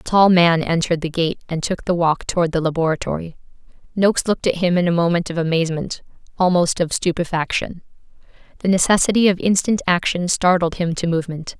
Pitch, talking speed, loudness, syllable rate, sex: 175 Hz, 175 wpm, -19 LUFS, 6.1 syllables/s, female